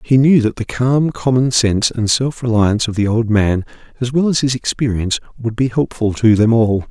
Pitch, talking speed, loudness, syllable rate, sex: 120 Hz, 215 wpm, -15 LUFS, 5.3 syllables/s, male